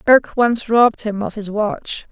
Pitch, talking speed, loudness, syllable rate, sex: 220 Hz, 200 wpm, -17 LUFS, 4.0 syllables/s, female